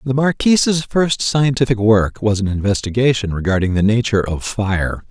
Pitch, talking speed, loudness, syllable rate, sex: 115 Hz, 155 wpm, -16 LUFS, 5.1 syllables/s, male